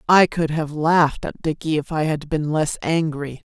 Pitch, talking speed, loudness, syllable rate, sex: 155 Hz, 205 wpm, -21 LUFS, 4.6 syllables/s, female